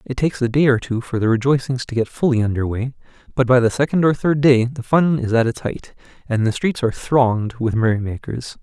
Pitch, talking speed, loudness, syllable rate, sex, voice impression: 125 Hz, 235 wpm, -19 LUFS, 5.8 syllables/s, male, very masculine, very adult-like, old, relaxed, weak, slightly dark, very soft, muffled, very fluent, slightly raspy, very cool, very intellectual, slightly refreshing, sincere, very calm, very mature, very friendly, very reassuring, unique, elegant, very sweet, slightly lively, very kind, very modest